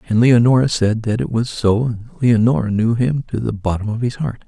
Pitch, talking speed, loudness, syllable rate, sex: 115 Hz, 230 wpm, -17 LUFS, 5.4 syllables/s, male